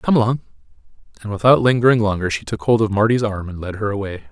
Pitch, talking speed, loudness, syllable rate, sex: 105 Hz, 225 wpm, -18 LUFS, 6.8 syllables/s, male